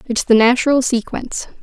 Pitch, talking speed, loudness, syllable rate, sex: 245 Hz, 150 wpm, -15 LUFS, 5.8 syllables/s, female